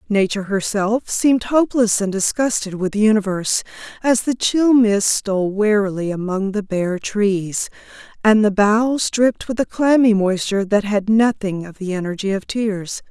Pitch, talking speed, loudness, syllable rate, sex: 210 Hz, 160 wpm, -18 LUFS, 4.8 syllables/s, female